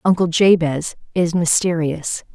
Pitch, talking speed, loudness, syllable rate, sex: 170 Hz, 100 wpm, -18 LUFS, 4.0 syllables/s, female